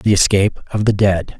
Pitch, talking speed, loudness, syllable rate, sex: 100 Hz, 215 wpm, -16 LUFS, 5.7 syllables/s, male